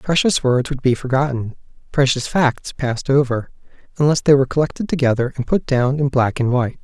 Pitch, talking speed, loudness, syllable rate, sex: 135 Hz, 185 wpm, -18 LUFS, 5.7 syllables/s, male